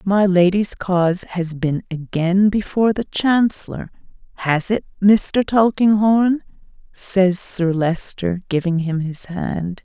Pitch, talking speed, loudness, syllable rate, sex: 190 Hz, 120 wpm, -18 LUFS, 3.8 syllables/s, female